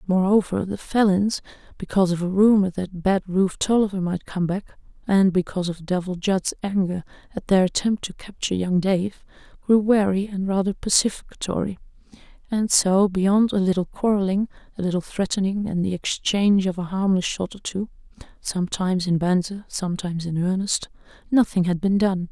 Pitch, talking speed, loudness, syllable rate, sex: 190 Hz, 160 wpm, -22 LUFS, 5.4 syllables/s, female